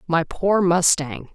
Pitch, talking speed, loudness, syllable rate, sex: 175 Hz, 135 wpm, -19 LUFS, 3.5 syllables/s, female